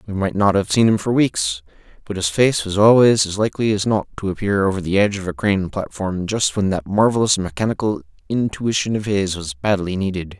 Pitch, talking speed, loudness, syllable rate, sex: 100 Hz, 215 wpm, -19 LUFS, 5.7 syllables/s, male